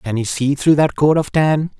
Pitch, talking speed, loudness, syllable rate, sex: 145 Hz, 270 wpm, -16 LUFS, 4.9 syllables/s, male